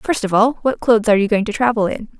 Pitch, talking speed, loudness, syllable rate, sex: 225 Hz, 300 wpm, -16 LUFS, 6.9 syllables/s, female